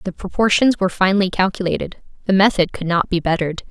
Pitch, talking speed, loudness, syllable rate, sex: 190 Hz, 180 wpm, -18 LUFS, 6.7 syllables/s, female